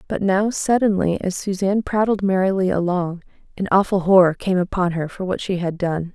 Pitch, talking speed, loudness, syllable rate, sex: 185 Hz, 185 wpm, -20 LUFS, 5.3 syllables/s, female